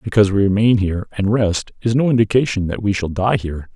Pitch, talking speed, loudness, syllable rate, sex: 105 Hz, 225 wpm, -17 LUFS, 6.3 syllables/s, male